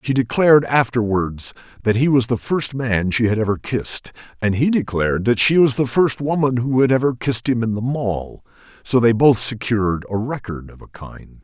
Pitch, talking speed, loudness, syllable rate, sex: 120 Hz, 205 wpm, -18 LUFS, 5.1 syllables/s, male